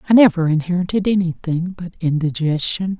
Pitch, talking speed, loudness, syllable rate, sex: 175 Hz, 120 wpm, -18 LUFS, 5.5 syllables/s, female